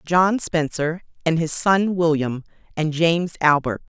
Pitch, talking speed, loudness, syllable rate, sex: 160 Hz, 135 wpm, -20 LUFS, 4.2 syllables/s, female